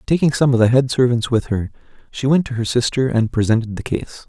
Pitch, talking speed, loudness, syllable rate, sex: 125 Hz, 240 wpm, -18 LUFS, 5.9 syllables/s, male